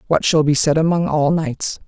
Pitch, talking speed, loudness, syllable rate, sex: 160 Hz, 225 wpm, -17 LUFS, 4.9 syllables/s, female